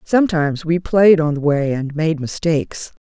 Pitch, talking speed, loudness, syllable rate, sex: 160 Hz, 180 wpm, -17 LUFS, 4.9 syllables/s, female